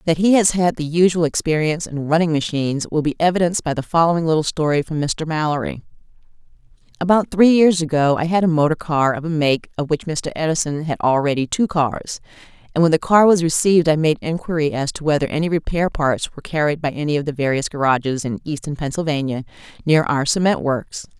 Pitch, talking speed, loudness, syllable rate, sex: 155 Hz, 200 wpm, -18 LUFS, 6.1 syllables/s, female